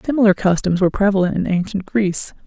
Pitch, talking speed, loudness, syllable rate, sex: 195 Hz, 170 wpm, -18 LUFS, 6.7 syllables/s, female